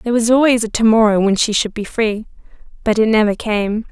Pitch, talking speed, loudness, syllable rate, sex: 220 Hz, 230 wpm, -15 LUFS, 5.8 syllables/s, female